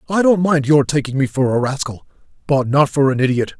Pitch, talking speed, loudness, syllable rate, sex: 140 Hz, 235 wpm, -16 LUFS, 5.7 syllables/s, male